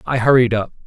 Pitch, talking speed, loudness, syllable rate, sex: 120 Hz, 210 wpm, -16 LUFS, 6.3 syllables/s, male